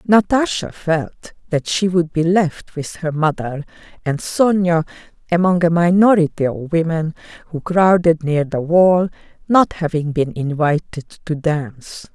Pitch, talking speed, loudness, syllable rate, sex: 165 Hz, 140 wpm, -17 LUFS, 4.1 syllables/s, female